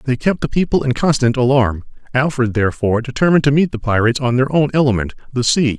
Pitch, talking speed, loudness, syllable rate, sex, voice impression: 130 Hz, 205 wpm, -16 LUFS, 6.7 syllables/s, male, masculine, middle-aged, tensed, powerful, clear, slightly raspy, cool, mature, wild, lively, slightly strict, intense